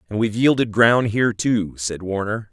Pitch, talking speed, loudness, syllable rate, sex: 105 Hz, 190 wpm, -19 LUFS, 5.3 syllables/s, male